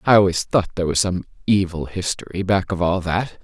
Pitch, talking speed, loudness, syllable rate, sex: 95 Hz, 210 wpm, -20 LUFS, 5.5 syllables/s, male